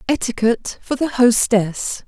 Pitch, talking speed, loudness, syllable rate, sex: 235 Hz, 115 wpm, -18 LUFS, 4.3 syllables/s, female